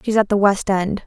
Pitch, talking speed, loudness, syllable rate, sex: 200 Hz, 280 wpm, -18 LUFS, 5.4 syllables/s, female